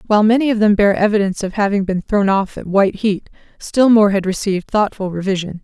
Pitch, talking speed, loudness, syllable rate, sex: 200 Hz, 215 wpm, -16 LUFS, 6.2 syllables/s, female